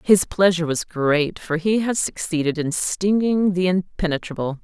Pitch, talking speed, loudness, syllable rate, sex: 175 Hz, 155 wpm, -21 LUFS, 4.7 syllables/s, female